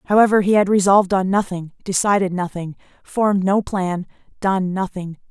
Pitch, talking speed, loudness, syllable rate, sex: 190 Hz, 145 wpm, -19 LUFS, 5.3 syllables/s, female